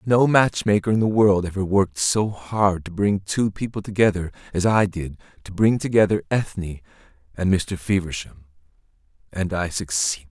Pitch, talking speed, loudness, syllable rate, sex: 95 Hz, 165 wpm, -21 LUFS, 5.0 syllables/s, male